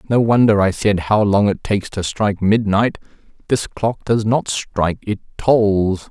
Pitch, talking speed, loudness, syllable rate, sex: 105 Hz, 175 wpm, -17 LUFS, 4.4 syllables/s, male